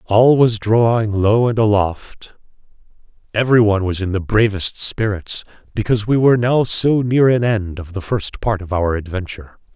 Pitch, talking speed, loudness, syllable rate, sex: 105 Hz, 165 wpm, -17 LUFS, 5.0 syllables/s, male